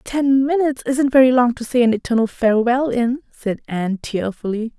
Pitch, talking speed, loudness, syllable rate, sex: 245 Hz, 175 wpm, -18 LUFS, 5.4 syllables/s, female